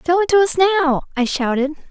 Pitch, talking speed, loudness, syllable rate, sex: 325 Hz, 220 wpm, -17 LUFS, 6.8 syllables/s, female